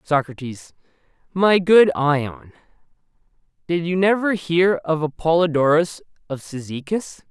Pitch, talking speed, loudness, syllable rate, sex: 165 Hz, 100 wpm, -19 LUFS, 4.1 syllables/s, male